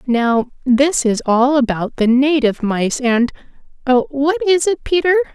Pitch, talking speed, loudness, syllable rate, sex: 270 Hz, 135 wpm, -16 LUFS, 4.0 syllables/s, female